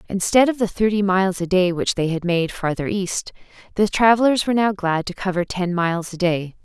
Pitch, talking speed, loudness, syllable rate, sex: 190 Hz, 215 wpm, -20 LUFS, 5.6 syllables/s, female